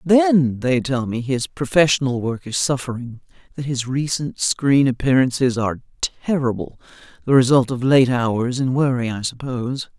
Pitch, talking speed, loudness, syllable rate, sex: 130 Hz, 150 wpm, -19 LUFS, 4.7 syllables/s, female